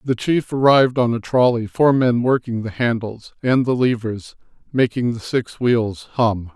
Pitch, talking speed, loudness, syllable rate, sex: 120 Hz, 175 wpm, -19 LUFS, 4.4 syllables/s, male